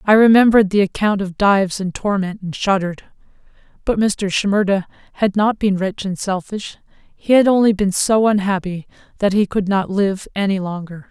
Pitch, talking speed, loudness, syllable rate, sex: 200 Hz, 175 wpm, -17 LUFS, 5.2 syllables/s, female